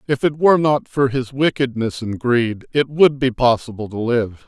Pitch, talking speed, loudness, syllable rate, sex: 125 Hz, 200 wpm, -18 LUFS, 4.7 syllables/s, male